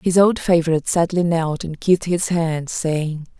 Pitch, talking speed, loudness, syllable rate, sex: 165 Hz, 175 wpm, -19 LUFS, 4.7 syllables/s, female